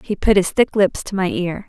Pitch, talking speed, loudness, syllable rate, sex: 195 Hz, 285 wpm, -18 LUFS, 5.1 syllables/s, female